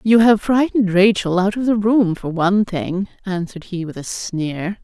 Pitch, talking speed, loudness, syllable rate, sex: 195 Hz, 200 wpm, -18 LUFS, 4.8 syllables/s, female